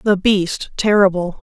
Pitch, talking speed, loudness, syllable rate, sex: 195 Hz, 120 wpm, -16 LUFS, 3.9 syllables/s, female